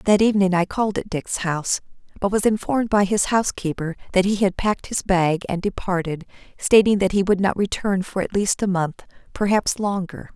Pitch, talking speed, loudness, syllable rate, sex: 195 Hz, 195 wpm, -21 LUFS, 5.5 syllables/s, female